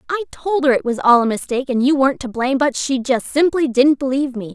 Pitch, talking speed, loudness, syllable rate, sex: 270 Hz, 265 wpm, -17 LUFS, 6.4 syllables/s, female